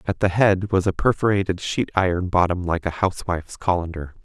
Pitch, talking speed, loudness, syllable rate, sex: 90 Hz, 185 wpm, -21 LUFS, 5.8 syllables/s, male